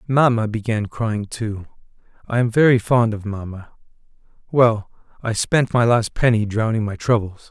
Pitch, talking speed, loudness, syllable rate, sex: 110 Hz, 135 wpm, -19 LUFS, 4.6 syllables/s, male